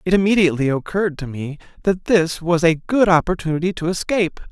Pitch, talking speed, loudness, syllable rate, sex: 175 Hz, 175 wpm, -19 LUFS, 6.1 syllables/s, male